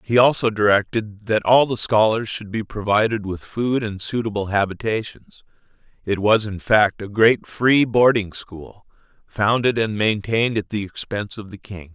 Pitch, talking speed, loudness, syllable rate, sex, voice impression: 105 Hz, 165 wpm, -20 LUFS, 4.6 syllables/s, male, very masculine, very adult-like, middle-aged, very thick, tensed, very powerful, slightly bright, slightly hard, slightly muffled, fluent, slightly raspy, cool, slightly intellectual, sincere, very calm, mature, friendly, reassuring, very wild, slightly sweet, kind, slightly intense